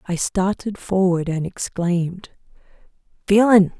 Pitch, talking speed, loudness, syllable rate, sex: 185 Hz, 95 wpm, -20 LUFS, 4.1 syllables/s, female